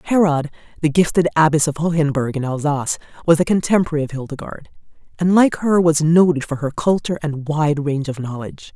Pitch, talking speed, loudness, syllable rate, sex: 155 Hz, 180 wpm, -18 LUFS, 6.0 syllables/s, female